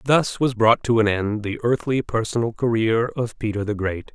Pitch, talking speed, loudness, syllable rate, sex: 115 Hz, 205 wpm, -21 LUFS, 4.8 syllables/s, male